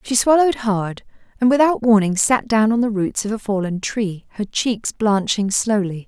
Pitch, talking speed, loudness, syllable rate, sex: 215 Hz, 190 wpm, -18 LUFS, 4.7 syllables/s, female